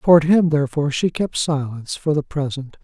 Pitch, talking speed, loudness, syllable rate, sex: 145 Hz, 190 wpm, -19 LUFS, 6.0 syllables/s, male